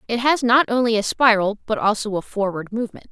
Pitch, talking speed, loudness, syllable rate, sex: 225 Hz, 210 wpm, -19 LUFS, 6.1 syllables/s, female